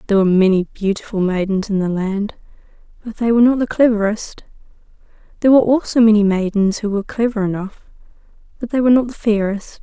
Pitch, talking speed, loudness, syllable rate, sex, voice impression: 210 Hz, 175 wpm, -16 LUFS, 6.6 syllables/s, female, feminine, adult-like, relaxed, slightly dark, soft, slightly halting, calm, slightly friendly, kind, modest